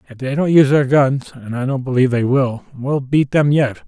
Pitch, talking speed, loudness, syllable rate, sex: 135 Hz, 215 wpm, -16 LUFS, 5.4 syllables/s, male